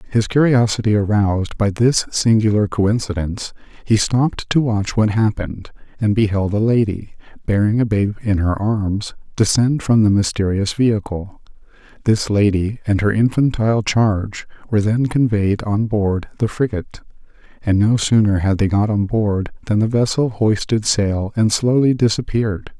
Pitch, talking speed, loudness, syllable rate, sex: 105 Hz, 150 wpm, -17 LUFS, 4.8 syllables/s, male